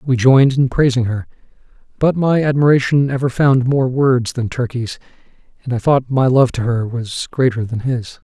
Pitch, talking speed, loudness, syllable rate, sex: 130 Hz, 180 wpm, -16 LUFS, 4.9 syllables/s, male